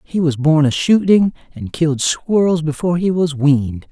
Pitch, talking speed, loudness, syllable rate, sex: 160 Hz, 185 wpm, -16 LUFS, 5.0 syllables/s, male